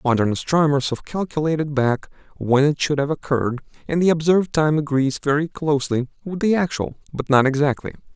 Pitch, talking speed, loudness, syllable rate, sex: 145 Hz, 170 wpm, -20 LUFS, 5.9 syllables/s, male